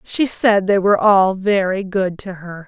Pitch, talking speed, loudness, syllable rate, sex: 195 Hz, 200 wpm, -16 LUFS, 4.3 syllables/s, female